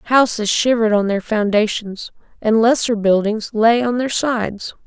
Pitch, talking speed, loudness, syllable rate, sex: 220 Hz, 150 wpm, -17 LUFS, 4.5 syllables/s, female